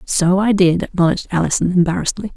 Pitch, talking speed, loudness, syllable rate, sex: 180 Hz, 155 wpm, -16 LUFS, 6.8 syllables/s, female